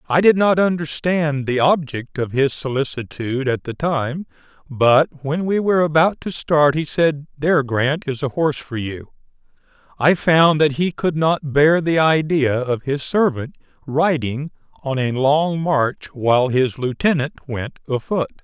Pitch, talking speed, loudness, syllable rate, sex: 145 Hz, 165 wpm, -19 LUFS, 4.3 syllables/s, male